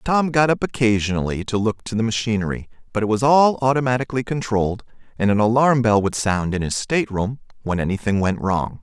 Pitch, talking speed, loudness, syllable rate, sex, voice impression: 115 Hz, 190 wpm, -20 LUFS, 5.9 syllables/s, male, masculine, adult-like, slightly fluent, cool, slightly refreshing, sincere, friendly